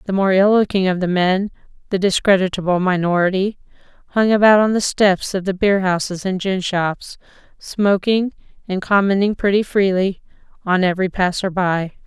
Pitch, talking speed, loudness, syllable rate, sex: 190 Hz, 145 wpm, -17 LUFS, 5.1 syllables/s, female